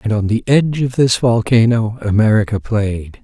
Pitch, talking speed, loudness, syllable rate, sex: 115 Hz, 165 wpm, -15 LUFS, 4.8 syllables/s, male